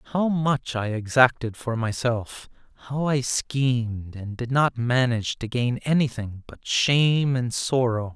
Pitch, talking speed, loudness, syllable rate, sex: 125 Hz, 145 wpm, -24 LUFS, 3.9 syllables/s, male